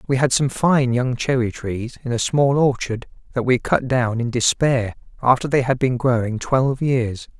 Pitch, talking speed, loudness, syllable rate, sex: 125 Hz, 195 wpm, -20 LUFS, 4.6 syllables/s, male